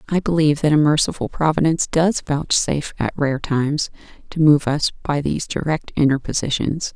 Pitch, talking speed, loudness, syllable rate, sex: 150 Hz, 155 wpm, -19 LUFS, 5.5 syllables/s, female